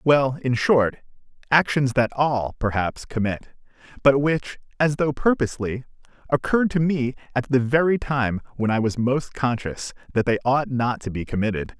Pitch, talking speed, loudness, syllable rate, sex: 130 Hz, 165 wpm, -22 LUFS, 4.8 syllables/s, male